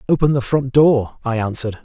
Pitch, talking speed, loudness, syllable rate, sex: 130 Hz, 195 wpm, -17 LUFS, 5.9 syllables/s, male